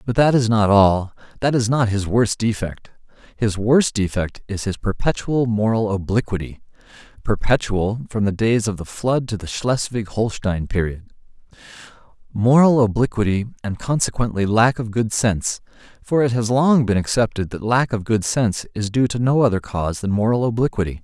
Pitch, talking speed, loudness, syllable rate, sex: 110 Hz, 165 wpm, -19 LUFS, 5.1 syllables/s, male